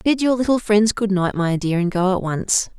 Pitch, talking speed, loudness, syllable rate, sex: 200 Hz, 260 wpm, -19 LUFS, 4.9 syllables/s, female